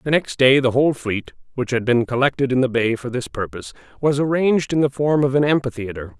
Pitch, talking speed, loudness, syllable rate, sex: 130 Hz, 230 wpm, -19 LUFS, 6.1 syllables/s, male